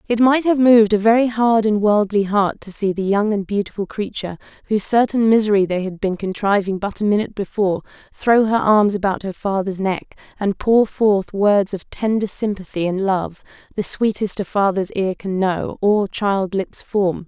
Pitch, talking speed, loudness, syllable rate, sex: 205 Hz, 190 wpm, -18 LUFS, 5.0 syllables/s, female